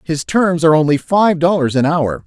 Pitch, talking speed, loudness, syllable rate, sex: 160 Hz, 210 wpm, -14 LUFS, 5.1 syllables/s, male